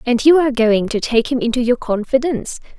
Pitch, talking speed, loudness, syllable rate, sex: 245 Hz, 215 wpm, -16 LUFS, 6.0 syllables/s, female